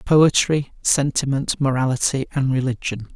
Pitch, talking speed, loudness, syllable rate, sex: 135 Hz, 95 wpm, -20 LUFS, 4.4 syllables/s, male